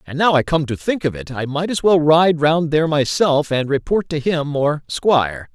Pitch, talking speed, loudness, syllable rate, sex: 150 Hz, 240 wpm, -17 LUFS, 4.8 syllables/s, male